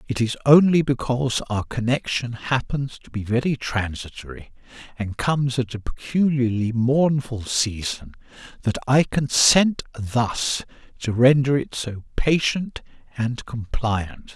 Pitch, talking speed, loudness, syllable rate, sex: 125 Hz, 135 wpm, -22 LUFS, 4.4 syllables/s, male